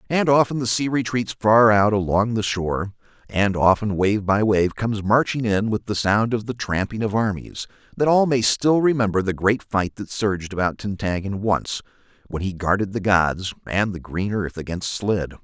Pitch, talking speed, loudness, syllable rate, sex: 105 Hz, 195 wpm, -21 LUFS, 4.8 syllables/s, male